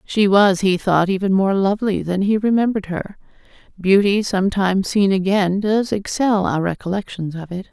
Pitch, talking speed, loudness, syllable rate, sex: 195 Hz, 165 wpm, -18 LUFS, 5.2 syllables/s, female